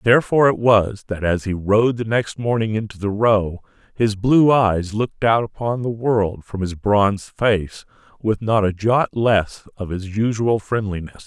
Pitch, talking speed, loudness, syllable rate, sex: 105 Hz, 180 wpm, -19 LUFS, 4.4 syllables/s, male